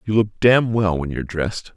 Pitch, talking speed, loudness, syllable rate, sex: 100 Hz, 240 wpm, -19 LUFS, 5.9 syllables/s, male